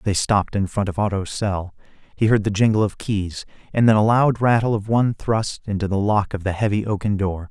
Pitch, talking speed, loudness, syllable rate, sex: 105 Hz, 230 wpm, -20 LUFS, 5.5 syllables/s, male